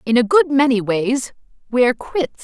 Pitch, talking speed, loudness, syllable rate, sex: 250 Hz, 175 wpm, -17 LUFS, 4.5 syllables/s, female